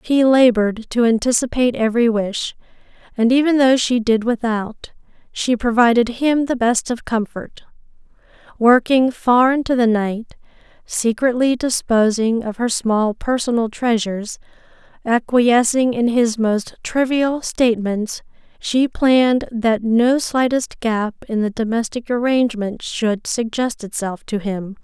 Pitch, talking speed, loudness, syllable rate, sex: 235 Hz, 125 wpm, -18 LUFS, 4.2 syllables/s, female